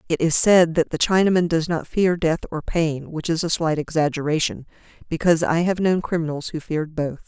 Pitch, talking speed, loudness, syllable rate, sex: 160 Hz, 205 wpm, -21 LUFS, 5.5 syllables/s, female